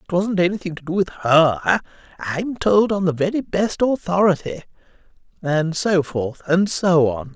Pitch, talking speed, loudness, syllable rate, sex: 175 Hz, 165 wpm, -19 LUFS, 4.7 syllables/s, male